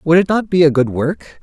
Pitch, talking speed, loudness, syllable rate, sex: 160 Hz, 295 wpm, -15 LUFS, 5.0 syllables/s, male